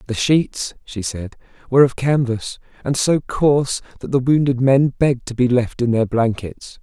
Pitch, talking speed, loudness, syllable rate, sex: 125 Hz, 185 wpm, -18 LUFS, 4.7 syllables/s, male